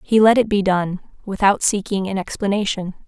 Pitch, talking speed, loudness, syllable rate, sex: 200 Hz, 175 wpm, -19 LUFS, 5.3 syllables/s, female